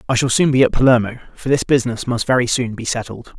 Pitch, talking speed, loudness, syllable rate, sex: 125 Hz, 250 wpm, -17 LUFS, 6.6 syllables/s, male